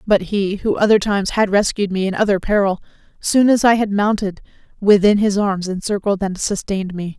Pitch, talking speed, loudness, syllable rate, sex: 200 Hz, 190 wpm, -17 LUFS, 5.4 syllables/s, female